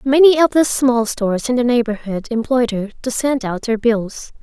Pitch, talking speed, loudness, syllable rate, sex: 240 Hz, 205 wpm, -17 LUFS, 4.8 syllables/s, female